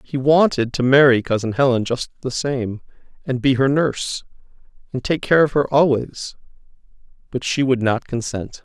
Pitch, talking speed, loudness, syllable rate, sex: 130 Hz, 165 wpm, -19 LUFS, 4.9 syllables/s, male